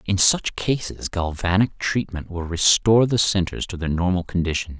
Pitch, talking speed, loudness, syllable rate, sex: 90 Hz, 165 wpm, -21 LUFS, 4.9 syllables/s, male